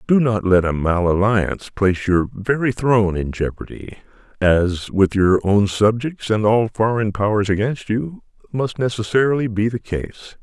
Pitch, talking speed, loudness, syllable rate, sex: 105 Hz, 160 wpm, -19 LUFS, 4.6 syllables/s, male